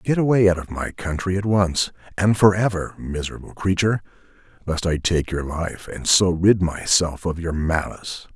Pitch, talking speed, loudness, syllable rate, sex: 90 Hz, 180 wpm, -21 LUFS, 4.9 syllables/s, male